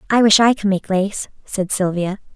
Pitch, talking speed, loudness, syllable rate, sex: 200 Hz, 205 wpm, -17 LUFS, 4.9 syllables/s, female